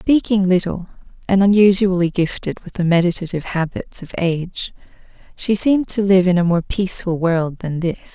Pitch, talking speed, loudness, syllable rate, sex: 185 Hz, 160 wpm, -18 LUFS, 5.4 syllables/s, female